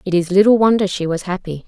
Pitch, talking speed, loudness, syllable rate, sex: 190 Hz, 250 wpm, -16 LUFS, 6.5 syllables/s, female